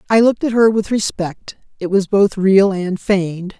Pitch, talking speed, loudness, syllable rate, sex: 200 Hz, 200 wpm, -16 LUFS, 4.8 syllables/s, female